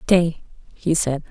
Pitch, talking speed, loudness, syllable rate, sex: 160 Hz, 140 wpm, -21 LUFS, 3.3 syllables/s, female